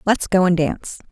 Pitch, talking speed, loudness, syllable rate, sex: 180 Hz, 215 wpm, -18 LUFS, 5.6 syllables/s, female